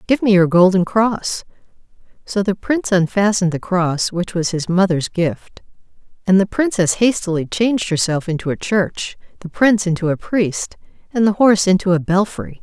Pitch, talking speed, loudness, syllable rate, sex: 190 Hz, 170 wpm, -17 LUFS, 5.1 syllables/s, female